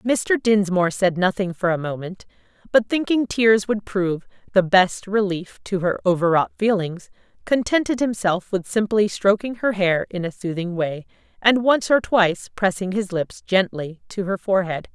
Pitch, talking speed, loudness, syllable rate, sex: 195 Hz, 165 wpm, -21 LUFS, 4.7 syllables/s, female